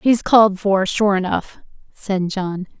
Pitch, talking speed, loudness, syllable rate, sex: 195 Hz, 150 wpm, -17 LUFS, 3.9 syllables/s, female